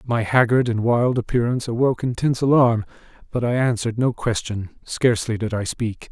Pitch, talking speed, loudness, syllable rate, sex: 115 Hz, 165 wpm, -21 LUFS, 5.7 syllables/s, male